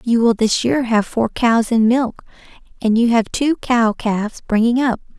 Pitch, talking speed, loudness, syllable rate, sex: 230 Hz, 195 wpm, -17 LUFS, 4.5 syllables/s, female